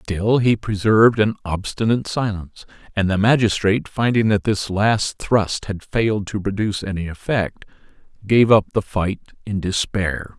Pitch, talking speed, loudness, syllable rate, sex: 105 Hz, 150 wpm, -19 LUFS, 4.7 syllables/s, male